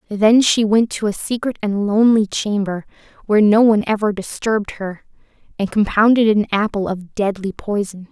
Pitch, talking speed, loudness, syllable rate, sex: 210 Hz, 165 wpm, -17 LUFS, 5.2 syllables/s, female